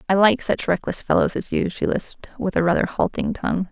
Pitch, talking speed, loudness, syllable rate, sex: 195 Hz, 225 wpm, -21 LUFS, 6.1 syllables/s, female